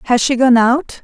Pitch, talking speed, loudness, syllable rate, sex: 250 Hz, 235 wpm, -13 LUFS, 4.7 syllables/s, female